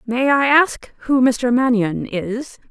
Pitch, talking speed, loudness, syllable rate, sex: 250 Hz, 155 wpm, -17 LUFS, 3.4 syllables/s, female